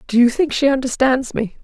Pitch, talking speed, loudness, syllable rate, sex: 255 Hz, 220 wpm, -17 LUFS, 5.5 syllables/s, female